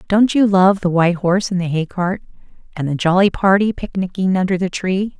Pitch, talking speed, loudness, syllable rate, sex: 185 Hz, 195 wpm, -17 LUFS, 5.6 syllables/s, female